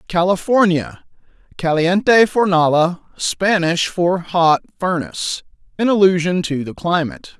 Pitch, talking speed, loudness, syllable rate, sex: 175 Hz, 90 wpm, -17 LUFS, 4.3 syllables/s, male